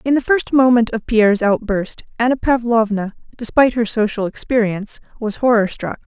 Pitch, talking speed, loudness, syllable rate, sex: 225 Hz, 155 wpm, -17 LUFS, 5.4 syllables/s, female